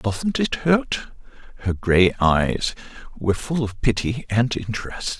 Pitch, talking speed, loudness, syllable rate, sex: 115 Hz, 125 wpm, -22 LUFS, 4.1 syllables/s, male